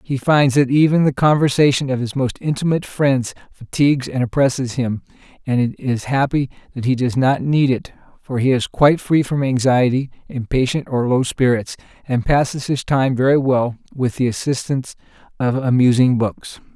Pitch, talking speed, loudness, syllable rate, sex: 130 Hz, 170 wpm, -18 LUFS, 5.2 syllables/s, male